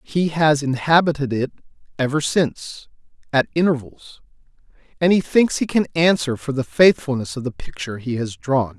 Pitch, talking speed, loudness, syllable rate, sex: 140 Hz, 155 wpm, -19 LUFS, 5.1 syllables/s, male